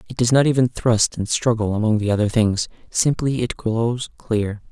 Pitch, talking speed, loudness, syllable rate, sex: 115 Hz, 190 wpm, -20 LUFS, 4.7 syllables/s, male